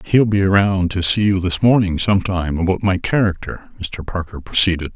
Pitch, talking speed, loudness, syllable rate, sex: 95 Hz, 180 wpm, -17 LUFS, 5.2 syllables/s, male